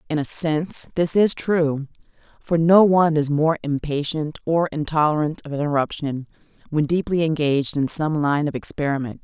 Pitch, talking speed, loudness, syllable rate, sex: 155 Hz, 155 wpm, -21 LUFS, 5.1 syllables/s, female